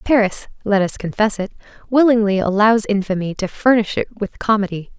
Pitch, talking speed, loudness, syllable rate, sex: 210 Hz, 135 wpm, -18 LUFS, 5.4 syllables/s, female